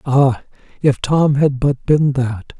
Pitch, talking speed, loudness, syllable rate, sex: 135 Hz, 160 wpm, -16 LUFS, 3.3 syllables/s, male